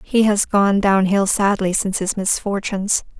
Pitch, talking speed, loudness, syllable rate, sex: 200 Hz, 170 wpm, -18 LUFS, 4.7 syllables/s, female